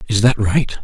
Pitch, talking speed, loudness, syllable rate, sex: 115 Hz, 215 wpm, -16 LUFS, 4.8 syllables/s, male